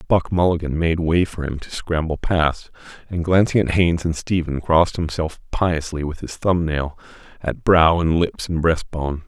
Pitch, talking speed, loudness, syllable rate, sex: 80 Hz, 175 wpm, -20 LUFS, 4.8 syllables/s, male